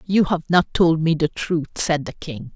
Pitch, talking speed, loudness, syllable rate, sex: 160 Hz, 235 wpm, -20 LUFS, 4.1 syllables/s, female